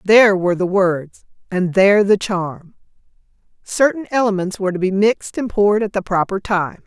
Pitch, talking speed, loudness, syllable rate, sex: 195 Hz, 175 wpm, -17 LUFS, 5.4 syllables/s, female